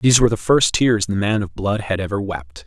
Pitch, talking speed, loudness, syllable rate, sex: 105 Hz, 270 wpm, -18 LUFS, 5.7 syllables/s, male